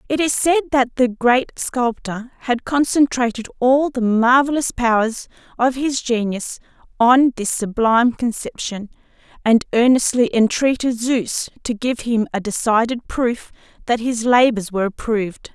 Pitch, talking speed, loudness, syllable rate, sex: 240 Hz, 135 wpm, -18 LUFS, 4.4 syllables/s, female